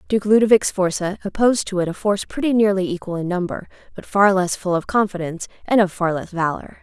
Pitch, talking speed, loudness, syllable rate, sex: 190 Hz, 210 wpm, -19 LUFS, 6.2 syllables/s, female